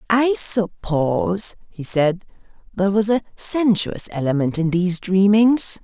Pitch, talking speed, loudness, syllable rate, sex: 190 Hz, 125 wpm, -19 LUFS, 4.1 syllables/s, male